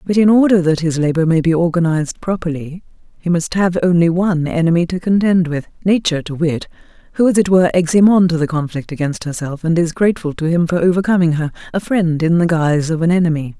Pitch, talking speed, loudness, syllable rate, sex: 170 Hz, 220 wpm, -15 LUFS, 6.2 syllables/s, female